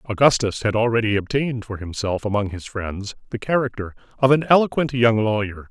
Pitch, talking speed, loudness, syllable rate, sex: 115 Hz, 170 wpm, -21 LUFS, 5.7 syllables/s, male